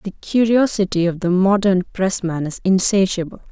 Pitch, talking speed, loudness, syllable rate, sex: 190 Hz, 135 wpm, -18 LUFS, 5.0 syllables/s, female